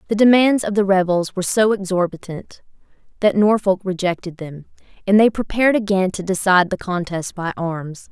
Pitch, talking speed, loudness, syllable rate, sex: 190 Hz, 165 wpm, -18 LUFS, 5.4 syllables/s, female